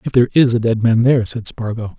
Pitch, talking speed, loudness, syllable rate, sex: 115 Hz, 270 wpm, -16 LUFS, 6.6 syllables/s, male